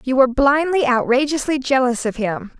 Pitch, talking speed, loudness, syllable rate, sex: 260 Hz, 160 wpm, -18 LUFS, 5.3 syllables/s, female